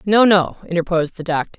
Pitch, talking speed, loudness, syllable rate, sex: 180 Hz, 190 wpm, -17 LUFS, 6.4 syllables/s, female